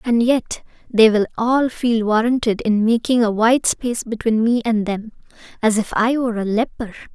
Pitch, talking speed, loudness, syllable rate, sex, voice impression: 225 Hz, 185 wpm, -18 LUFS, 4.9 syllables/s, female, feminine, gender-neutral, very young, very thin, tensed, slightly powerful, very bright, soft, very clear, fluent, cute, slightly intellectual, very refreshing, sincere, slightly calm, friendly, reassuring, very unique, elegant, slightly sweet, very lively, slightly strict, slightly sharp, slightly modest